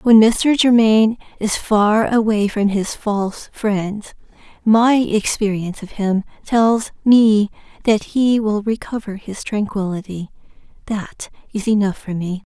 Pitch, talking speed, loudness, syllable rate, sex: 210 Hz, 130 wpm, -17 LUFS, 3.9 syllables/s, female